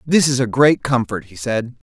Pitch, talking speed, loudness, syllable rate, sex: 125 Hz, 220 wpm, -18 LUFS, 4.8 syllables/s, male